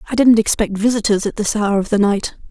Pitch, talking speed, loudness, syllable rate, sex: 210 Hz, 240 wpm, -16 LUFS, 6.0 syllables/s, female